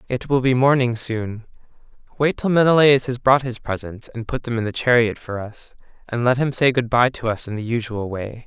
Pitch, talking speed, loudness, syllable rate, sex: 120 Hz, 225 wpm, -20 LUFS, 5.3 syllables/s, male